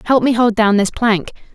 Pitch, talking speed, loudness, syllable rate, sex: 225 Hz, 235 wpm, -15 LUFS, 5.2 syllables/s, female